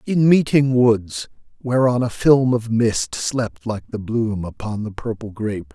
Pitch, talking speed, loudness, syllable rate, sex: 115 Hz, 165 wpm, -19 LUFS, 4.0 syllables/s, male